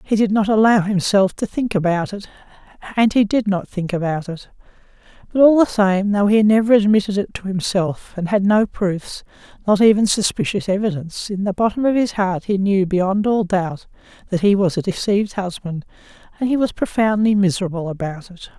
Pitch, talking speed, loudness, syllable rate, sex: 200 Hz, 190 wpm, -18 LUFS, 5.4 syllables/s, female